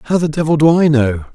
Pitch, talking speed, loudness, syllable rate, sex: 150 Hz, 270 wpm, -13 LUFS, 5.7 syllables/s, male